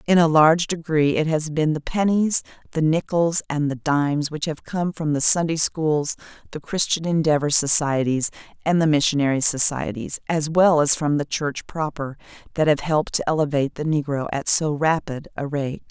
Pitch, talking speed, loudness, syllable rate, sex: 155 Hz, 180 wpm, -21 LUFS, 5.1 syllables/s, female